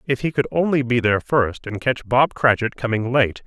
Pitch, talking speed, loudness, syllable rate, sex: 125 Hz, 225 wpm, -20 LUFS, 5.2 syllables/s, male